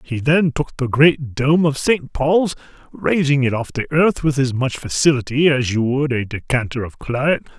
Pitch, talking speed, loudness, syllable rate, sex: 140 Hz, 200 wpm, -18 LUFS, 4.7 syllables/s, male